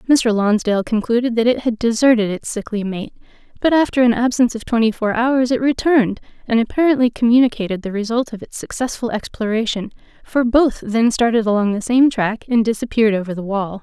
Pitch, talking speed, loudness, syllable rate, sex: 230 Hz, 180 wpm, -17 LUFS, 5.9 syllables/s, female